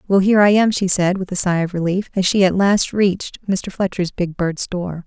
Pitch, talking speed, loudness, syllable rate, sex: 185 Hz, 250 wpm, -18 LUFS, 5.4 syllables/s, female